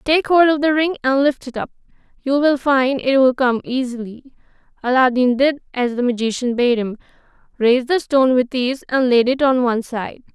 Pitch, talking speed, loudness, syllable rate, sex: 260 Hz, 195 wpm, -17 LUFS, 5.2 syllables/s, female